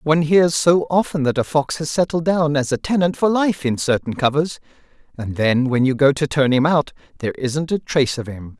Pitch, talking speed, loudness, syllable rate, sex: 145 Hz, 230 wpm, -18 LUFS, 5.4 syllables/s, male